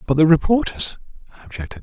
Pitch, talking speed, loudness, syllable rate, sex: 125 Hz, 165 wpm, -18 LUFS, 7.1 syllables/s, male